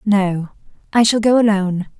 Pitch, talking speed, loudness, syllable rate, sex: 205 Hz, 150 wpm, -16 LUFS, 5.0 syllables/s, female